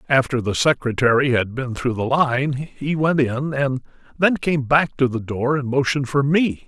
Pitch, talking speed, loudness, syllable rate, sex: 135 Hz, 200 wpm, -20 LUFS, 4.6 syllables/s, male